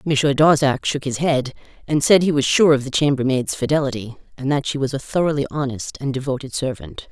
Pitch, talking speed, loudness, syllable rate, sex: 140 Hz, 200 wpm, -19 LUFS, 5.8 syllables/s, female